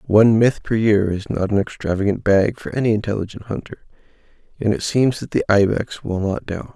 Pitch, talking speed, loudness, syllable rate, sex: 105 Hz, 195 wpm, -19 LUFS, 5.6 syllables/s, male